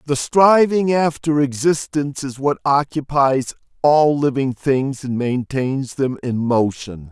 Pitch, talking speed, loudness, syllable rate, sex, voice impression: 140 Hz, 125 wpm, -18 LUFS, 3.8 syllables/s, male, very masculine, very adult-like, slightly old, very thick, tensed, powerful, slightly bright, hard, clear, slightly fluent, cool, slightly intellectual, slightly refreshing, sincere, very calm, friendly, reassuring, unique, wild, slightly sweet, slightly lively, kind